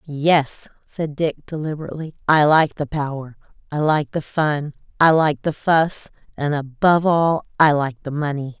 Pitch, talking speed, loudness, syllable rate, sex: 150 Hz, 160 wpm, -19 LUFS, 4.5 syllables/s, female